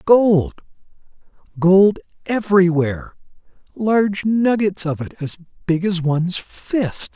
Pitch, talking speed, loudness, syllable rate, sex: 185 Hz, 90 wpm, -18 LUFS, 3.9 syllables/s, male